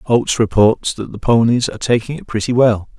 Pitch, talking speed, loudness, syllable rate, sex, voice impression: 115 Hz, 200 wpm, -16 LUFS, 5.7 syllables/s, male, masculine, adult-like, relaxed, slightly weak, slightly dark, clear, raspy, cool, intellectual, calm, friendly, wild, lively, slightly kind